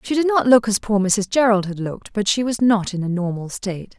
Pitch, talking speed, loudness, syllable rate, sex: 210 Hz, 270 wpm, -19 LUFS, 5.7 syllables/s, female